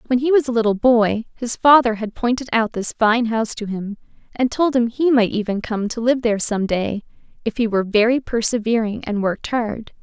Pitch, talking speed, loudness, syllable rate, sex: 230 Hz, 215 wpm, -19 LUFS, 5.4 syllables/s, female